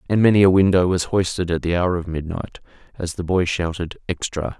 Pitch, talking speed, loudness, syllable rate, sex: 90 Hz, 210 wpm, -20 LUFS, 5.5 syllables/s, male